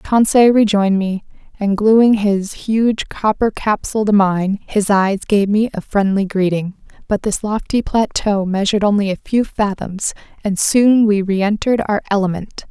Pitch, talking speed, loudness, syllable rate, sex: 205 Hz, 155 wpm, -16 LUFS, 4.5 syllables/s, female